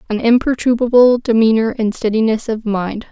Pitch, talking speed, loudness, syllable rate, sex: 225 Hz, 135 wpm, -15 LUFS, 5.2 syllables/s, female